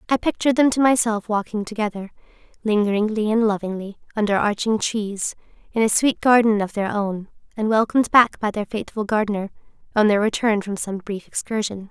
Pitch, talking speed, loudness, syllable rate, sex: 210 Hz, 170 wpm, -21 LUFS, 5.6 syllables/s, female